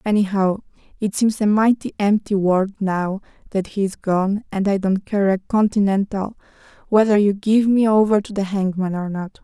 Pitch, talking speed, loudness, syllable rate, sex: 200 Hz, 180 wpm, -19 LUFS, 4.8 syllables/s, female